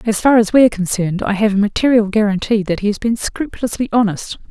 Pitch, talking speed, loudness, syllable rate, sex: 215 Hz, 225 wpm, -16 LUFS, 6.6 syllables/s, female